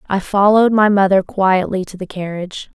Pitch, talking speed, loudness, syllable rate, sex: 195 Hz, 170 wpm, -15 LUFS, 5.5 syllables/s, female